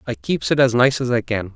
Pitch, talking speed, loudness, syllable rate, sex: 125 Hz, 310 wpm, -18 LUFS, 5.7 syllables/s, male